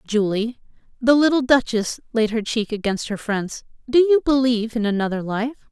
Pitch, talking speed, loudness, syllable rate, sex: 235 Hz, 145 wpm, -20 LUFS, 5.3 syllables/s, female